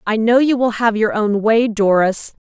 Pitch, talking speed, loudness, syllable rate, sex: 220 Hz, 220 wpm, -15 LUFS, 4.5 syllables/s, female